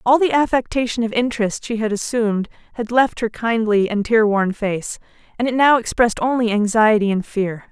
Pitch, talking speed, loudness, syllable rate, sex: 225 Hz, 185 wpm, -18 LUFS, 5.3 syllables/s, female